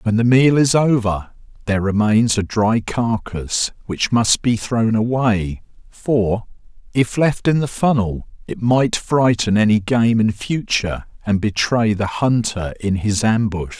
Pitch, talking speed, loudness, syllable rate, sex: 110 Hz, 150 wpm, -18 LUFS, 4.0 syllables/s, male